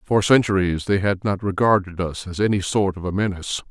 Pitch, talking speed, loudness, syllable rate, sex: 95 Hz, 210 wpm, -21 LUFS, 5.7 syllables/s, male